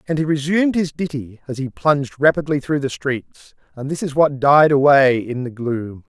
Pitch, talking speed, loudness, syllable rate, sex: 140 Hz, 205 wpm, -18 LUFS, 5.0 syllables/s, male